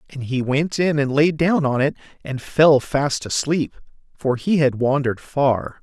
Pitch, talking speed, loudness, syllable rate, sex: 140 Hz, 185 wpm, -20 LUFS, 4.4 syllables/s, male